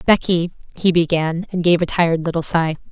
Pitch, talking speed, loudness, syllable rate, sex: 170 Hz, 185 wpm, -18 LUFS, 5.5 syllables/s, female